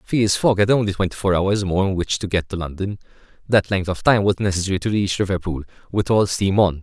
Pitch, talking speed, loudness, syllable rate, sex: 95 Hz, 235 wpm, -20 LUFS, 6.0 syllables/s, male